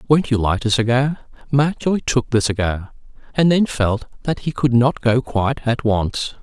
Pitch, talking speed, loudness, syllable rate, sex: 125 Hz, 185 wpm, -19 LUFS, 4.4 syllables/s, male